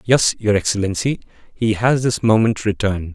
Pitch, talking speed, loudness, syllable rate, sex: 110 Hz, 150 wpm, -18 LUFS, 5.1 syllables/s, male